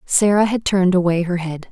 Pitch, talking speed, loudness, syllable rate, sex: 185 Hz, 210 wpm, -17 LUFS, 5.7 syllables/s, female